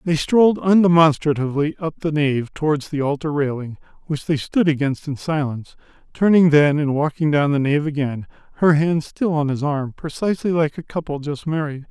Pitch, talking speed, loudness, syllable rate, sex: 150 Hz, 180 wpm, -19 LUFS, 5.4 syllables/s, male